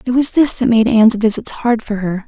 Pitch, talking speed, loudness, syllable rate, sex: 230 Hz, 265 wpm, -14 LUFS, 5.6 syllables/s, female